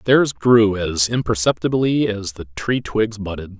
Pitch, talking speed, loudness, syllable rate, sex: 105 Hz, 150 wpm, -19 LUFS, 4.0 syllables/s, male